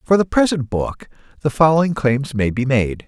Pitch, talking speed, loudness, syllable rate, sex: 140 Hz, 195 wpm, -18 LUFS, 5.0 syllables/s, male